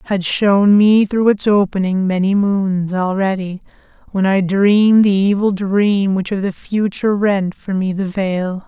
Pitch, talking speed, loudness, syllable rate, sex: 195 Hz, 165 wpm, -15 LUFS, 4.1 syllables/s, female